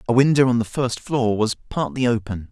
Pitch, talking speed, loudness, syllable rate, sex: 120 Hz, 215 wpm, -20 LUFS, 5.5 syllables/s, male